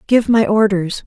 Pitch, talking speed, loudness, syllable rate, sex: 210 Hz, 170 wpm, -15 LUFS, 4.4 syllables/s, female